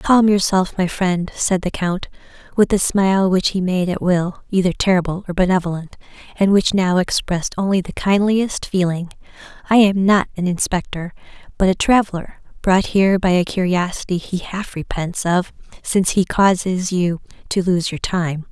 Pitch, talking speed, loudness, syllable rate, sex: 185 Hz, 170 wpm, -18 LUFS, 4.9 syllables/s, female